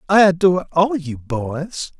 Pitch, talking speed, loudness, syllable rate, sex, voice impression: 165 Hz, 150 wpm, -18 LUFS, 4.1 syllables/s, male, masculine, adult-like, thick, powerful, muffled, slightly raspy, cool, intellectual, friendly, slightly unique, wild, kind, modest